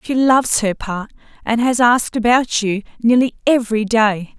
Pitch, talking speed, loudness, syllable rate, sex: 230 Hz, 165 wpm, -16 LUFS, 4.9 syllables/s, female